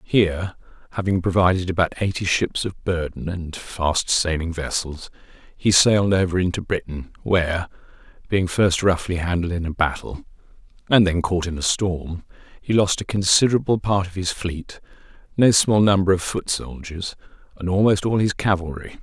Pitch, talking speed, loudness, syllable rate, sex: 90 Hz, 160 wpm, -21 LUFS, 5.0 syllables/s, male